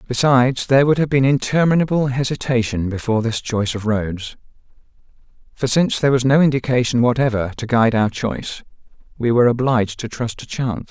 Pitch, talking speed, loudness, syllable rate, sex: 125 Hz, 165 wpm, -18 LUFS, 6.2 syllables/s, male